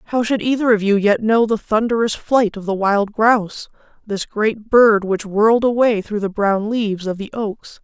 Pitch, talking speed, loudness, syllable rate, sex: 215 Hz, 205 wpm, -17 LUFS, 4.7 syllables/s, female